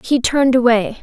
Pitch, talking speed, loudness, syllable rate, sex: 245 Hz, 175 wpm, -14 LUFS, 5.4 syllables/s, female